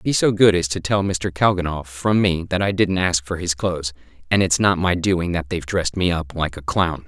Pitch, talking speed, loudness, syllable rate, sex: 90 Hz, 255 wpm, -20 LUFS, 5.3 syllables/s, male